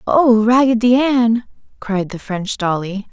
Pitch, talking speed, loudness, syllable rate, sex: 225 Hz, 135 wpm, -16 LUFS, 3.8 syllables/s, female